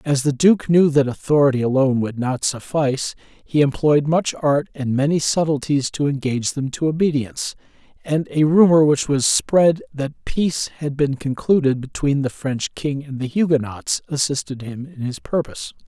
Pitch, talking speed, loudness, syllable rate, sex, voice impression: 145 Hz, 170 wpm, -19 LUFS, 5.0 syllables/s, male, masculine, middle-aged, thick, slightly powerful, hard, raspy, calm, mature, friendly, reassuring, wild, kind, slightly modest